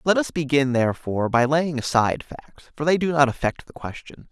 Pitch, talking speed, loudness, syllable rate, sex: 140 Hz, 210 wpm, -22 LUFS, 5.6 syllables/s, male